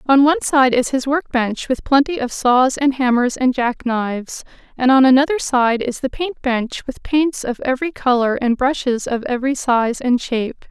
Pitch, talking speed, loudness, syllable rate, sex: 260 Hz, 200 wpm, -17 LUFS, 4.9 syllables/s, female